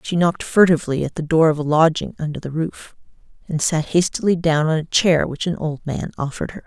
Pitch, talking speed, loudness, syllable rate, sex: 160 Hz, 225 wpm, -19 LUFS, 5.9 syllables/s, female